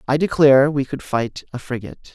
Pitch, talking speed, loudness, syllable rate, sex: 135 Hz, 195 wpm, -18 LUFS, 5.8 syllables/s, male